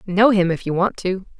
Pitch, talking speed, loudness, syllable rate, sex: 190 Hz, 260 wpm, -19 LUFS, 5.1 syllables/s, female